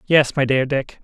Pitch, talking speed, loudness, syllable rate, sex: 135 Hz, 230 wpm, -18 LUFS, 4.3 syllables/s, male